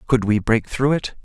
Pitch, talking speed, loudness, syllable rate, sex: 120 Hz, 240 wpm, -20 LUFS, 4.7 syllables/s, male